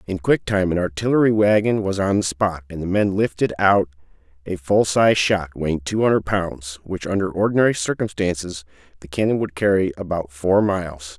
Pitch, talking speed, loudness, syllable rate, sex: 90 Hz, 180 wpm, -20 LUFS, 5.3 syllables/s, male